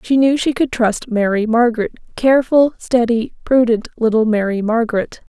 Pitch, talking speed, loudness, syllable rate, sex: 235 Hz, 135 wpm, -16 LUFS, 5.1 syllables/s, female